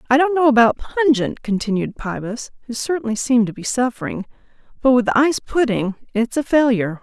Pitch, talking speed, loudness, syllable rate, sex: 245 Hz, 170 wpm, -18 LUFS, 6.4 syllables/s, female